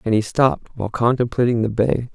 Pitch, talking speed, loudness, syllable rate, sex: 115 Hz, 195 wpm, -19 LUFS, 5.9 syllables/s, male